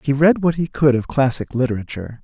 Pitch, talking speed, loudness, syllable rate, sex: 140 Hz, 215 wpm, -18 LUFS, 6.1 syllables/s, male